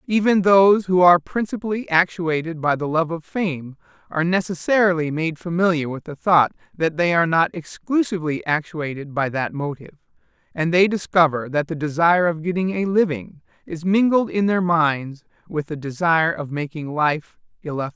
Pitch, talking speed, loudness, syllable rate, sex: 165 Hz, 165 wpm, -20 LUFS, 5.3 syllables/s, male